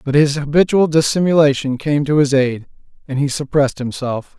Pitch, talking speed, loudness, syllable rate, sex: 145 Hz, 165 wpm, -16 LUFS, 5.4 syllables/s, male